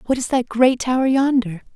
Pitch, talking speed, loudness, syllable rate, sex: 250 Hz, 205 wpm, -18 LUFS, 5.2 syllables/s, female